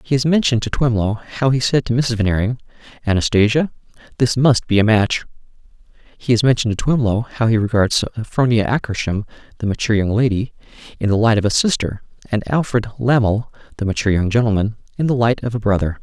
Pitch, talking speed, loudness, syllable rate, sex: 115 Hz, 185 wpm, -18 LUFS, 5.5 syllables/s, male